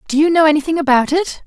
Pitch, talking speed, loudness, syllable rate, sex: 305 Hz, 245 wpm, -14 LUFS, 7.0 syllables/s, female